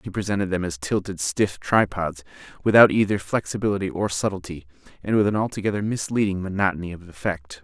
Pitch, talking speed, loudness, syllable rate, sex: 95 Hz, 155 wpm, -23 LUFS, 6.0 syllables/s, male